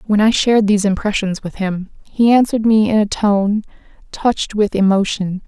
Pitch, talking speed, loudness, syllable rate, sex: 210 Hz, 175 wpm, -16 LUFS, 5.4 syllables/s, female